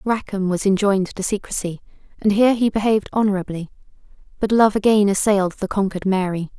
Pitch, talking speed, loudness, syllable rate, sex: 200 Hz, 155 wpm, -19 LUFS, 6.3 syllables/s, female